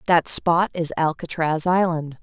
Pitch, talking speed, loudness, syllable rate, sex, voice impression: 165 Hz, 135 wpm, -20 LUFS, 4.0 syllables/s, female, feminine, adult-like, slightly intellectual